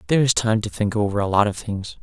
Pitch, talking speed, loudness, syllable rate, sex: 105 Hz, 295 wpm, -21 LUFS, 6.7 syllables/s, male